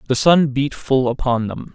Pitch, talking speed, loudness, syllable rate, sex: 135 Hz, 205 wpm, -18 LUFS, 4.5 syllables/s, male